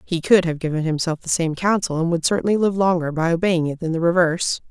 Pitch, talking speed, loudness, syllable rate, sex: 170 Hz, 245 wpm, -20 LUFS, 6.2 syllables/s, female